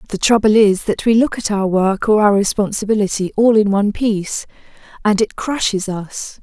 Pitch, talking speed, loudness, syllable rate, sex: 210 Hz, 185 wpm, -16 LUFS, 5.2 syllables/s, female